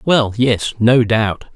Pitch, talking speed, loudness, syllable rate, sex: 115 Hz, 155 wpm, -15 LUFS, 3.0 syllables/s, male